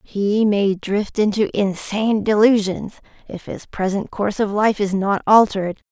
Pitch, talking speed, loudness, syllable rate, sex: 205 Hz, 150 wpm, -18 LUFS, 4.5 syllables/s, female